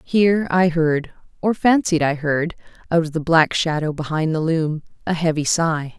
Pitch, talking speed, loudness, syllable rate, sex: 165 Hz, 160 wpm, -19 LUFS, 4.6 syllables/s, female